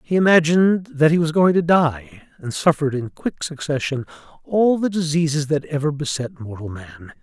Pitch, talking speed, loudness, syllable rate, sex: 150 Hz, 175 wpm, -19 LUFS, 5.2 syllables/s, male